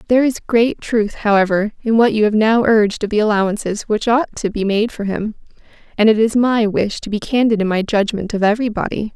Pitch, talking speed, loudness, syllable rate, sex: 215 Hz, 230 wpm, -16 LUFS, 5.7 syllables/s, female